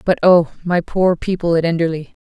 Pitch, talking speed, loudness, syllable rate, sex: 170 Hz, 185 wpm, -16 LUFS, 5.1 syllables/s, female